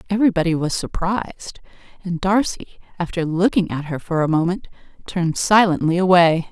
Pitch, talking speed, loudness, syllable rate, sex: 175 Hz, 140 wpm, -19 LUFS, 5.6 syllables/s, female